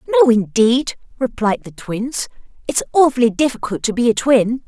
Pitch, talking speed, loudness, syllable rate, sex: 235 Hz, 155 wpm, -17 LUFS, 5.1 syllables/s, female